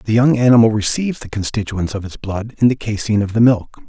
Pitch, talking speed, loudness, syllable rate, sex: 110 Hz, 230 wpm, -16 LUFS, 6.1 syllables/s, male